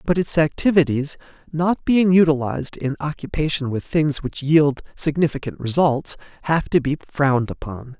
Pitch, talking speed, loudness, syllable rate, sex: 150 Hz, 145 wpm, -20 LUFS, 4.9 syllables/s, male